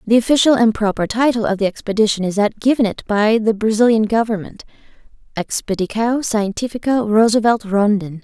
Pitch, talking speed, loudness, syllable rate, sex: 220 Hz, 145 wpm, -16 LUFS, 5.6 syllables/s, female